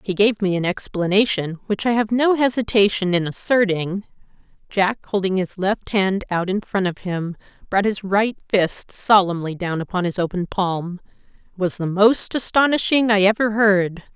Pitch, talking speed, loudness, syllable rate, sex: 200 Hz, 155 wpm, -20 LUFS, 4.7 syllables/s, female